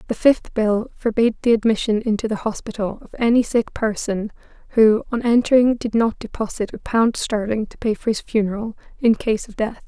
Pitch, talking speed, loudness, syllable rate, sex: 220 Hz, 190 wpm, -20 LUFS, 5.3 syllables/s, female